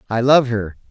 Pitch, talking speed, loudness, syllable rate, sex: 120 Hz, 200 wpm, -16 LUFS, 5.0 syllables/s, male